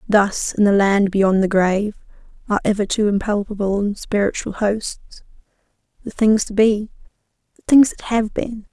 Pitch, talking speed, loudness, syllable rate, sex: 205 Hz, 150 wpm, -18 LUFS, 5.0 syllables/s, female